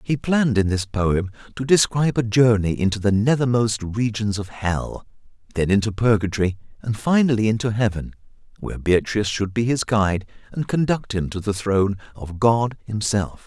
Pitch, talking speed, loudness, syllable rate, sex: 110 Hz, 165 wpm, -21 LUFS, 5.2 syllables/s, male